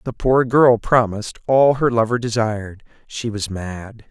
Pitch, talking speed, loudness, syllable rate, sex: 115 Hz, 160 wpm, -18 LUFS, 4.4 syllables/s, male